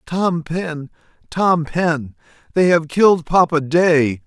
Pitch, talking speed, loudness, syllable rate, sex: 160 Hz, 125 wpm, -17 LUFS, 3.3 syllables/s, male